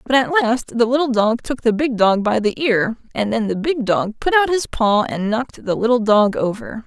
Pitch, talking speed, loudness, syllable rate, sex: 235 Hz, 245 wpm, -18 LUFS, 4.9 syllables/s, female